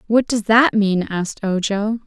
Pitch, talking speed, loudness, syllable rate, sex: 210 Hz, 175 wpm, -18 LUFS, 4.3 syllables/s, female